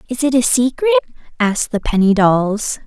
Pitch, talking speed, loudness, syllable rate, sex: 230 Hz, 170 wpm, -15 LUFS, 5.1 syllables/s, female